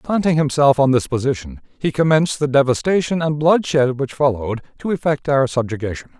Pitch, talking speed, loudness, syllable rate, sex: 140 Hz, 165 wpm, -18 LUFS, 5.7 syllables/s, male